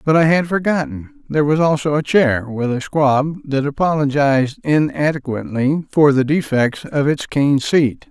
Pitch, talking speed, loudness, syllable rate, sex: 145 Hz, 155 wpm, -17 LUFS, 4.7 syllables/s, male